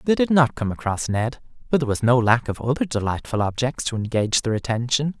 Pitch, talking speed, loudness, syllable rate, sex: 125 Hz, 220 wpm, -22 LUFS, 6.1 syllables/s, male